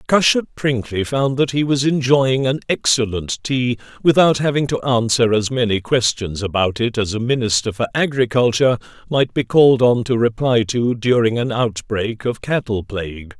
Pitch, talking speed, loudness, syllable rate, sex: 120 Hz, 165 wpm, -18 LUFS, 4.9 syllables/s, male